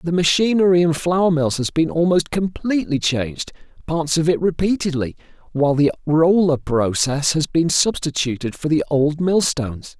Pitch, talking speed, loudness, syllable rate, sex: 160 Hz, 150 wpm, -18 LUFS, 4.9 syllables/s, male